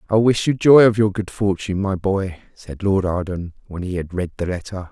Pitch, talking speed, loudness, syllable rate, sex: 95 Hz, 230 wpm, -19 LUFS, 5.3 syllables/s, male